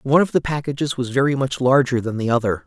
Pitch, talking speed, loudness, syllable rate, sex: 130 Hz, 250 wpm, -20 LUFS, 6.5 syllables/s, male